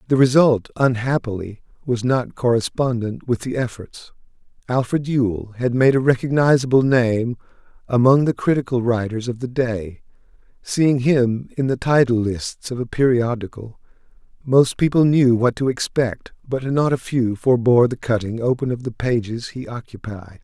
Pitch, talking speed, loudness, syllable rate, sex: 125 Hz, 150 wpm, -19 LUFS, 4.6 syllables/s, male